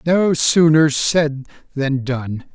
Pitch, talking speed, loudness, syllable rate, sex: 145 Hz, 120 wpm, -16 LUFS, 2.8 syllables/s, male